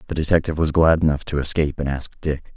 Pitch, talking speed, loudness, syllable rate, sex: 75 Hz, 235 wpm, -20 LUFS, 7.1 syllables/s, male